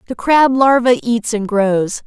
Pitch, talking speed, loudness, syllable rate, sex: 235 Hz, 175 wpm, -14 LUFS, 3.8 syllables/s, female